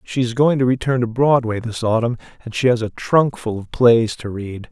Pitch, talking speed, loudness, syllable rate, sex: 120 Hz, 230 wpm, -18 LUFS, 5.1 syllables/s, male